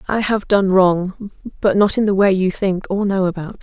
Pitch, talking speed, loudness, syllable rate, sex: 195 Hz, 230 wpm, -17 LUFS, 4.8 syllables/s, female